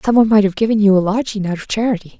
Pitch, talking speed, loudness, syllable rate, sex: 210 Hz, 300 wpm, -15 LUFS, 7.7 syllables/s, female